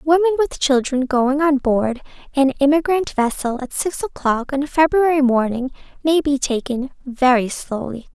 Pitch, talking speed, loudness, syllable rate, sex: 275 Hz, 155 wpm, -18 LUFS, 4.6 syllables/s, female